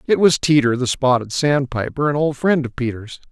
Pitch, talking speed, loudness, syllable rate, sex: 135 Hz, 200 wpm, -18 LUFS, 5.2 syllables/s, male